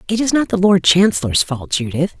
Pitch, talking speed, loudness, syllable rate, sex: 180 Hz, 220 wpm, -15 LUFS, 5.5 syllables/s, female